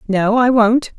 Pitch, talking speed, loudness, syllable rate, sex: 225 Hz, 185 wpm, -14 LUFS, 3.7 syllables/s, female